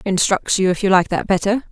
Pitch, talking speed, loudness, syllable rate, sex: 195 Hz, 245 wpm, -17 LUFS, 5.7 syllables/s, female